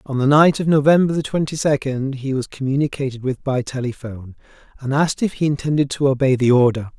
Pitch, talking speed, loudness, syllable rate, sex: 135 Hz, 190 wpm, -18 LUFS, 6.0 syllables/s, male